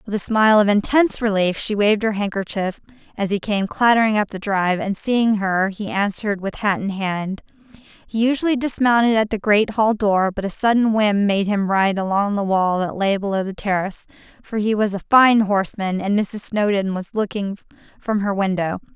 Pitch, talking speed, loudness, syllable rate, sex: 205 Hz, 200 wpm, -19 LUFS, 5.3 syllables/s, female